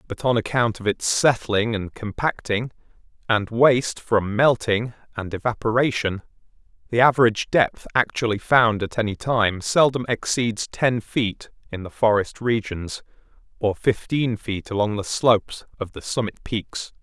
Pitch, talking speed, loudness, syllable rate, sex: 115 Hz, 140 wpm, -22 LUFS, 4.4 syllables/s, male